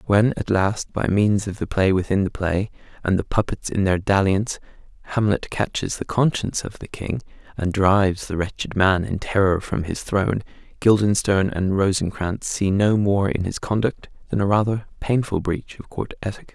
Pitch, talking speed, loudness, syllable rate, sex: 100 Hz, 185 wpm, -22 LUFS, 5.1 syllables/s, male